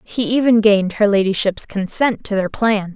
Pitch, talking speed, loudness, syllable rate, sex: 210 Hz, 185 wpm, -17 LUFS, 4.9 syllables/s, female